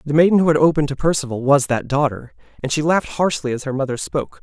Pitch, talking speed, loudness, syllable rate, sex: 145 Hz, 245 wpm, -18 LUFS, 6.9 syllables/s, male